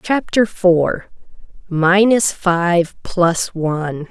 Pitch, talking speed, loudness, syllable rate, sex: 180 Hz, 75 wpm, -16 LUFS, 2.7 syllables/s, female